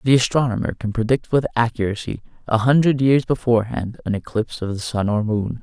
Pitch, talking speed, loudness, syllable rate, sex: 115 Hz, 180 wpm, -20 LUFS, 5.9 syllables/s, male